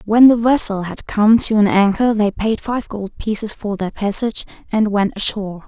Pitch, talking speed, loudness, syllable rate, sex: 215 Hz, 200 wpm, -16 LUFS, 4.9 syllables/s, female